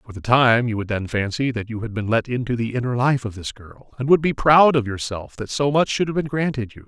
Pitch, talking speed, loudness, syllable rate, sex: 120 Hz, 290 wpm, -20 LUFS, 5.7 syllables/s, male